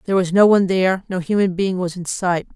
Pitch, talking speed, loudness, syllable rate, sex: 185 Hz, 260 wpm, -18 LUFS, 6.4 syllables/s, female